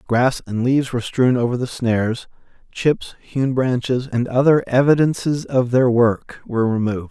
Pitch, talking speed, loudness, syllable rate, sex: 125 Hz, 160 wpm, -19 LUFS, 4.9 syllables/s, male